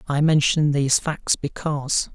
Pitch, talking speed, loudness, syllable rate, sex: 145 Hz, 140 wpm, -21 LUFS, 4.6 syllables/s, male